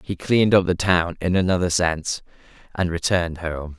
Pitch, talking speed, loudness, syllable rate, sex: 90 Hz, 175 wpm, -21 LUFS, 4.5 syllables/s, male